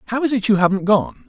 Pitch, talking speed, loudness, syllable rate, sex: 200 Hz, 280 wpm, -17 LUFS, 6.7 syllables/s, male